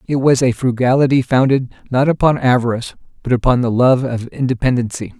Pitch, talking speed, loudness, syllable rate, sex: 125 Hz, 160 wpm, -15 LUFS, 6.0 syllables/s, male